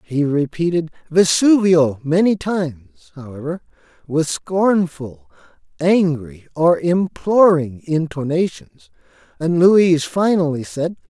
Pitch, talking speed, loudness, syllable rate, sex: 160 Hz, 85 wpm, -17 LUFS, 3.7 syllables/s, male